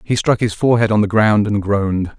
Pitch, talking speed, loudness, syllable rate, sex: 105 Hz, 245 wpm, -16 LUFS, 5.7 syllables/s, male